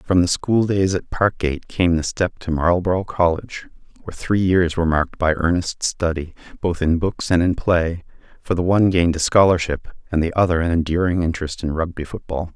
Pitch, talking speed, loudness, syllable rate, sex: 85 Hz, 195 wpm, -20 LUFS, 5.7 syllables/s, male